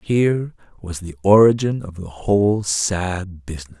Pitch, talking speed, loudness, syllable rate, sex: 100 Hz, 140 wpm, -18 LUFS, 4.4 syllables/s, male